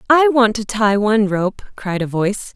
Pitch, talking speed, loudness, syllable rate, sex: 215 Hz, 210 wpm, -17 LUFS, 4.8 syllables/s, female